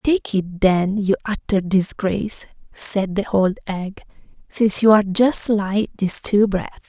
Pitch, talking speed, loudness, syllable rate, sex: 200 Hz, 155 wpm, -19 LUFS, 4.2 syllables/s, female